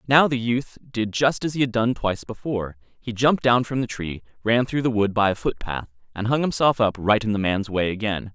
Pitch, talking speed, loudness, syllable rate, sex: 115 Hz, 245 wpm, -23 LUFS, 5.4 syllables/s, male